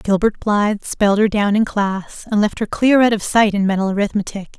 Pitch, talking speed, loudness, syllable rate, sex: 205 Hz, 220 wpm, -17 LUFS, 5.4 syllables/s, female